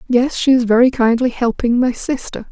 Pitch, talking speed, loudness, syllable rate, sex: 245 Hz, 190 wpm, -15 LUFS, 5.2 syllables/s, female